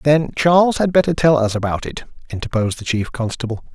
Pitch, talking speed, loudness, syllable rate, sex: 135 Hz, 190 wpm, -18 LUFS, 6.1 syllables/s, male